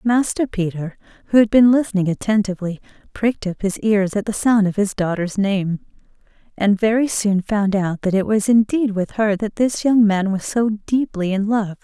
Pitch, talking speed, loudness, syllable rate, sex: 205 Hz, 195 wpm, -19 LUFS, 5.0 syllables/s, female